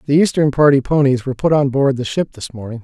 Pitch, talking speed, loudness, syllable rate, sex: 140 Hz, 255 wpm, -15 LUFS, 6.4 syllables/s, male